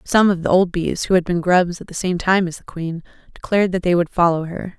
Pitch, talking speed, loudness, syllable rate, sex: 180 Hz, 275 wpm, -19 LUFS, 5.7 syllables/s, female